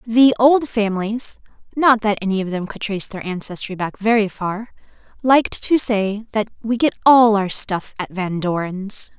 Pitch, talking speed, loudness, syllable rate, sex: 210 Hz, 165 wpm, -18 LUFS, 4.7 syllables/s, female